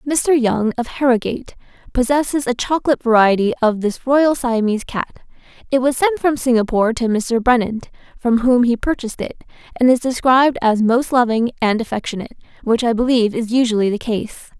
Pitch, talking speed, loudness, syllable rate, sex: 245 Hz, 170 wpm, -17 LUFS, 5.8 syllables/s, female